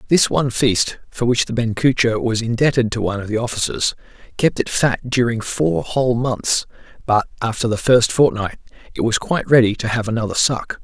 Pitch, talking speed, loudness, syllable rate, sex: 120 Hz, 190 wpm, -18 LUFS, 5.4 syllables/s, male